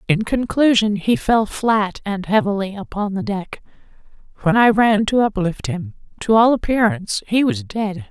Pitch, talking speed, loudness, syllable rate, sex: 210 Hz, 165 wpm, -18 LUFS, 4.6 syllables/s, female